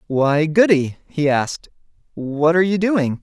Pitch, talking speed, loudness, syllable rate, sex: 160 Hz, 150 wpm, -18 LUFS, 4.3 syllables/s, male